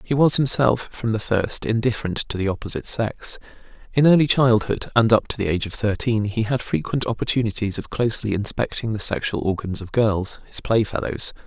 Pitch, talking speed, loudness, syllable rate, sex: 110 Hz, 185 wpm, -21 LUFS, 5.6 syllables/s, male